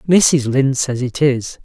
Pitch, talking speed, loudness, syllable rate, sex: 135 Hz, 185 wpm, -16 LUFS, 4.1 syllables/s, male